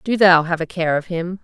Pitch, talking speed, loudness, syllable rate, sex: 175 Hz, 295 wpm, -17 LUFS, 5.3 syllables/s, female